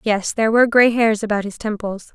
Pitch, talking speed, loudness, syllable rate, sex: 215 Hz, 225 wpm, -17 LUFS, 5.9 syllables/s, female